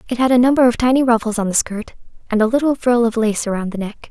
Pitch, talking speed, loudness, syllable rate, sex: 235 Hz, 280 wpm, -16 LUFS, 6.7 syllables/s, female